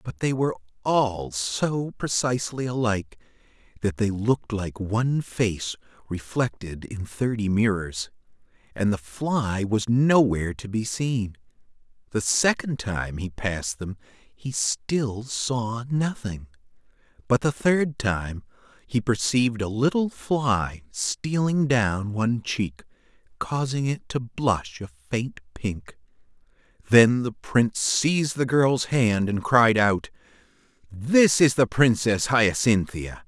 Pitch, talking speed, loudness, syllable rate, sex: 115 Hz, 125 wpm, -24 LUFS, 3.7 syllables/s, male